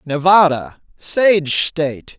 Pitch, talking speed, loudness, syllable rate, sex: 165 Hz, 80 wpm, -15 LUFS, 3.1 syllables/s, male